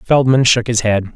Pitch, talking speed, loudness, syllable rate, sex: 115 Hz, 210 wpm, -14 LUFS, 4.8 syllables/s, male